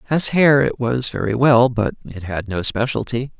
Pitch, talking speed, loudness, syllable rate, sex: 125 Hz, 195 wpm, -17 LUFS, 4.9 syllables/s, male